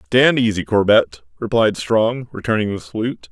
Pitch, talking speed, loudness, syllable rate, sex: 110 Hz, 145 wpm, -18 LUFS, 5.0 syllables/s, male